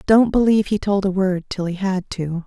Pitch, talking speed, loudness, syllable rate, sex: 195 Hz, 245 wpm, -19 LUFS, 5.2 syllables/s, female